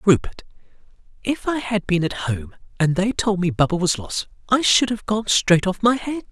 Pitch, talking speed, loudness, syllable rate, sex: 190 Hz, 210 wpm, -20 LUFS, 4.8 syllables/s, male